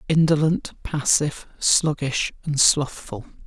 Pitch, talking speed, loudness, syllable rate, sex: 145 Hz, 85 wpm, -21 LUFS, 3.9 syllables/s, male